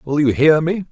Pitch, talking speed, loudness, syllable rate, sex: 150 Hz, 265 wpm, -15 LUFS, 4.8 syllables/s, male